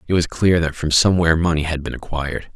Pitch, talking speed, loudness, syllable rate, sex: 80 Hz, 235 wpm, -18 LUFS, 6.7 syllables/s, male